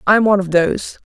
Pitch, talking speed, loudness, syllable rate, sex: 195 Hz, 280 wpm, -15 LUFS, 7.9 syllables/s, female